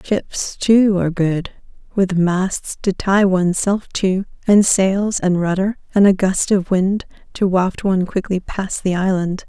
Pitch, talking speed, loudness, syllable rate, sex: 190 Hz, 170 wpm, -17 LUFS, 4.0 syllables/s, female